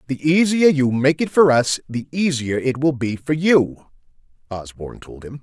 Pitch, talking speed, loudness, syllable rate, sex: 135 Hz, 190 wpm, -18 LUFS, 4.6 syllables/s, male